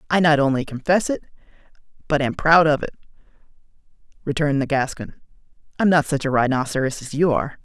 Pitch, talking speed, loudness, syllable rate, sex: 145 Hz, 165 wpm, -20 LUFS, 6.4 syllables/s, male